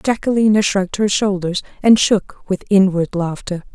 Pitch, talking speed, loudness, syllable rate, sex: 195 Hz, 145 wpm, -16 LUFS, 4.9 syllables/s, female